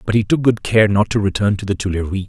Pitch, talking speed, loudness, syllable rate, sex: 105 Hz, 290 wpm, -17 LUFS, 6.5 syllables/s, male